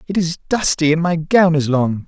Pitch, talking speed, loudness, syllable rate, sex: 165 Hz, 230 wpm, -16 LUFS, 4.7 syllables/s, male